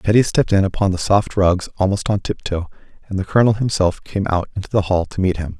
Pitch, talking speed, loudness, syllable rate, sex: 95 Hz, 235 wpm, -18 LUFS, 6.2 syllables/s, male